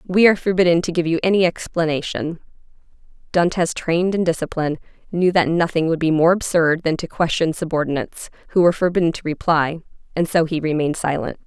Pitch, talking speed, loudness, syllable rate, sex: 165 Hz, 175 wpm, -19 LUFS, 6.3 syllables/s, female